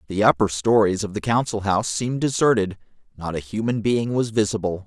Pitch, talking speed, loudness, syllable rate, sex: 105 Hz, 185 wpm, -22 LUFS, 5.8 syllables/s, male